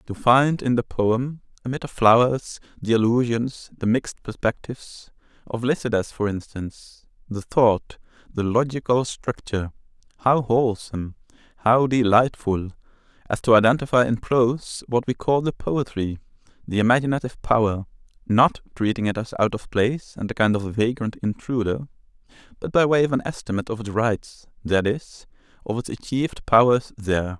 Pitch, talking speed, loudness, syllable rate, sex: 115 Hz, 145 wpm, -22 LUFS, 5.1 syllables/s, male